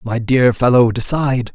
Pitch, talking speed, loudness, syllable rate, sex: 125 Hz, 155 wpm, -15 LUFS, 4.8 syllables/s, male